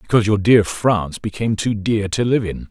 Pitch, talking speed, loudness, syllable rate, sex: 105 Hz, 220 wpm, -18 LUFS, 5.6 syllables/s, male